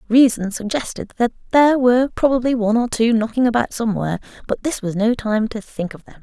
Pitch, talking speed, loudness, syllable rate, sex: 230 Hz, 205 wpm, -19 LUFS, 6.2 syllables/s, female